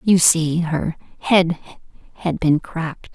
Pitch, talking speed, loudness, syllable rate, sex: 165 Hz, 135 wpm, -19 LUFS, 3.7 syllables/s, female